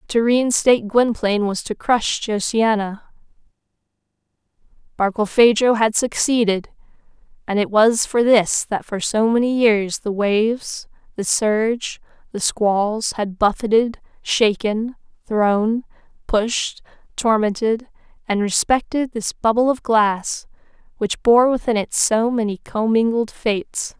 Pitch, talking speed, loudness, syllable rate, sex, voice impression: 220 Hz, 115 wpm, -19 LUFS, 4.0 syllables/s, female, slightly feminine, slightly adult-like, intellectual, slightly calm